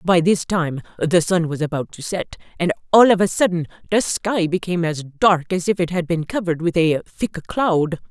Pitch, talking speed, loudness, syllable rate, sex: 175 Hz, 215 wpm, -19 LUFS, 5.1 syllables/s, female